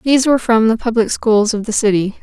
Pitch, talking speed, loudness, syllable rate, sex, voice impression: 225 Hz, 245 wpm, -14 LUFS, 6.2 syllables/s, female, feminine, slightly young, slightly powerful, slightly bright, soft, calm, friendly, reassuring, kind